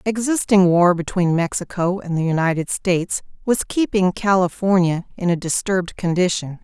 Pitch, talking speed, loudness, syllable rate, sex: 180 Hz, 135 wpm, -19 LUFS, 5.1 syllables/s, female